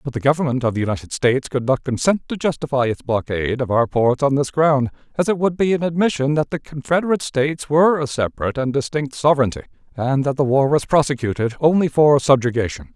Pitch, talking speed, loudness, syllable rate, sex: 135 Hz, 210 wpm, -19 LUFS, 6.3 syllables/s, male